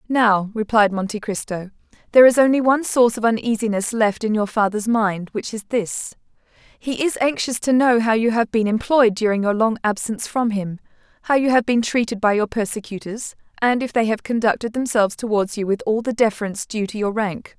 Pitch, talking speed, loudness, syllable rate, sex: 220 Hz, 200 wpm, -19 LUFS, 5.6 syllables/s, female